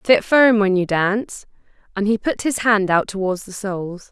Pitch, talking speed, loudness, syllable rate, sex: 205 Hz, 205 wpm, -18 LUFS, 4.9 syllables/s, female